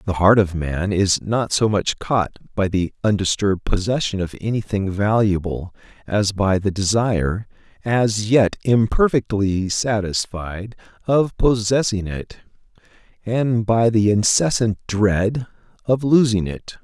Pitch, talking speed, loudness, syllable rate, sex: 105 Hz, 125 wpm, -19 LUFS, 4.0 syllables/s, male